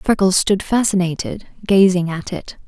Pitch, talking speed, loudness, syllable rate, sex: 190 Hz, 135 wpm, -17 LUFS, 4.7 syllables/s, female